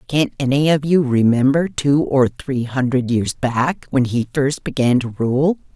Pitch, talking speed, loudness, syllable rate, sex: 135 Hz, 175 wpm, -18 LUFS, 4.2 syllables/s, female